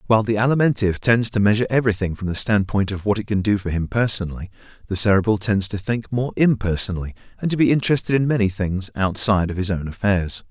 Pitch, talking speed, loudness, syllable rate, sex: 105 Hz, 210 wpm, -20 LUFS, 6.7 syllables/s, male